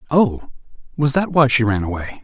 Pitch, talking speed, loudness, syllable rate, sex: 130 Hz, 190 wpm, -18 LUFS, 5.3 syllables/s, male